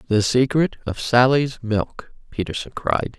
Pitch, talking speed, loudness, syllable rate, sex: 120 Hz, 130 wpm, -20 LUFS, 4.1 syllables/s, female